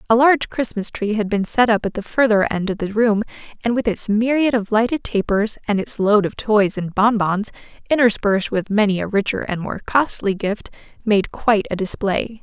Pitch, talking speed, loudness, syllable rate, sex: 215 Hz, 205 wpm, -19 LUFS, 5.2 syllables/s, female